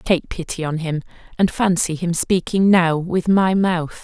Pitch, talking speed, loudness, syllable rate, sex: 175 Hz, 180 wpm, -19 LUFS, 4.1 syllables/s, female